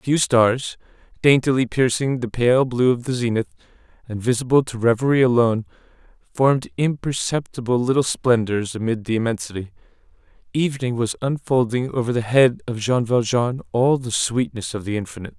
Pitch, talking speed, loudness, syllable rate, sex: 120 Hz, 150 wpm, -20 LUFS, 5.5 syllables/s, male